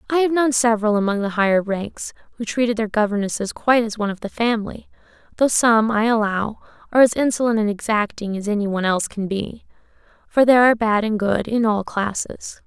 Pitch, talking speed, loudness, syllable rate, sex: 220 Hz, 200 wpm, -19 LUFS, 6.1 syllables/s, female